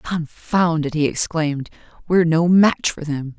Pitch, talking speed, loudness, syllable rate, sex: 160 Hz, 160 wpm, -19 LUFS, 4.4 syllables/s, female